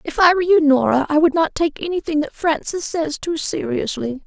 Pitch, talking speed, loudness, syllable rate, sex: 305 Hz, 210 wpm, -18 LUFS, 5.3 syllables/s, female